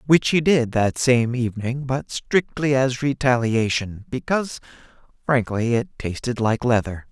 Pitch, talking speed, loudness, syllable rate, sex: 125 Hz, 135 wpm, -21 LUFS, 4.3 syllables/s, male